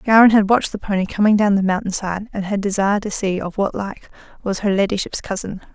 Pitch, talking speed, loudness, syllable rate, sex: 200 Hz, 230 wpm, -19 LUFS, 6.1 syllables/s, female